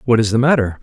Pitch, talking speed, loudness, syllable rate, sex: 115 Hz, 290 wpm, -15 LUFS, 7.3 syllables/s, male